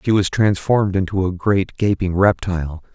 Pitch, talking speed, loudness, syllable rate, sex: 95 Hz, 165 wpm, -18 LUFS, 5.1 syllables/s, male